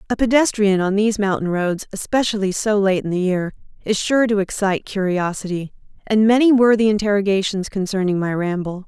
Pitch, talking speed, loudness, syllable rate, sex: 200 Hz, 170 wpm, -18 LUFS, 5.8 syllables/s, female